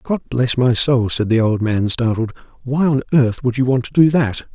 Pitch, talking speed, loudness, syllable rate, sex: 125 Hz, 240 wpm, -17 LUFS, 4.9 syllables/s, male